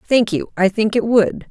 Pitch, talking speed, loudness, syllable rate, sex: 210 Hz, 240 wpm, -17 LUFS, 4.5 syllables/s, female